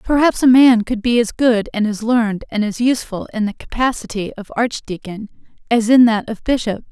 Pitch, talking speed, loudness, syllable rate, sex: 225 Hz, 200 wpm, -17 LUFS, 5.3 syllables/s, female